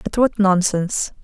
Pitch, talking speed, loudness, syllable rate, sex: 200 Hz, 145 wpm, -18 LUFS, 4.5 syllables/s, female